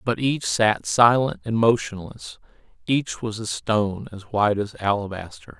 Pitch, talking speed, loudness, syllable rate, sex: 110 Hz, 140 wpm, -22 LUFS, 4.5 syllables/s, male